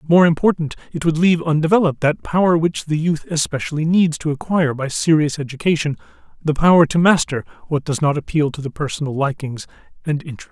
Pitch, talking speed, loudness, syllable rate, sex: 155 Hz, 185 wpm, -18 LUFS, 6.2 syllables/s, male